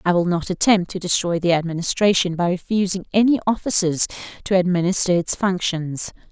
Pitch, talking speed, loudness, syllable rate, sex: 180 Hz, 150 wpm, -20 LUFS, 5.6 syllables/s, female